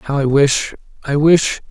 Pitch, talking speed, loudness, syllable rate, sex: 145 Hz, 140 wpm, -15 LUFS, 3.9 syllables/s, male